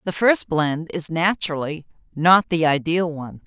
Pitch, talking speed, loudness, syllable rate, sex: 165 Hz, 155 wpm, -20 LUFS, 4.7 syllables/s, female